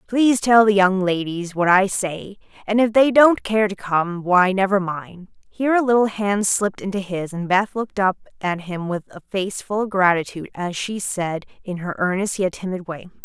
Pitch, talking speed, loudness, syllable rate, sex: 195 Hz, 210 wpm, -20 LUFS, 5.0 syllables/s, female